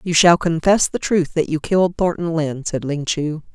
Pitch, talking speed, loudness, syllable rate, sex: 165 Hz, 220 wpm, -18 LUFS, 5.1 syllables/s, female